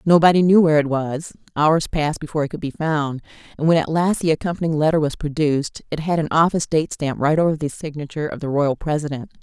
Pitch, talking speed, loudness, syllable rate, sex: 155 Hz, 225 wpm, -20 LUFS, 6.4 syllables/s, female